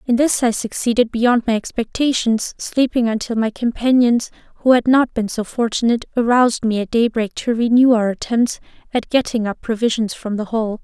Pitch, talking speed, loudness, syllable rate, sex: 235 Hz, 175 wpm, -18 LUFS, 5.3 syllables/s, female